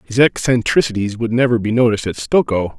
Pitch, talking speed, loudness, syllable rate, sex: 115 Hz, 170 wpm, -16 LUFS, 6.0 syllables/s, male